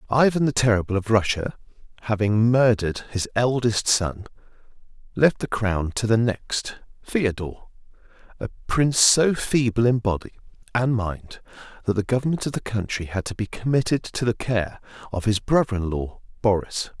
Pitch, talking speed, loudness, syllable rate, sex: 110 Hz, 155 wpm, -22 LUFS, 5.0 syllables/s, male